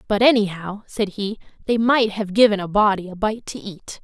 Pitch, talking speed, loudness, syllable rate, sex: 205 Hz, 210 wpm, -20 LUFS, 5.1 syllables/s, female